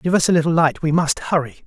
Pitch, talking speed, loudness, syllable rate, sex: 160 Hz, 250 wpm, -18 LUFS, 6.1 syllables/s, male